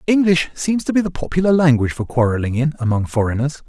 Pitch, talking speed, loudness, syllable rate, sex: 145 Hz, 195 wpm, -18 LUFS, 6.4 syllables/s, male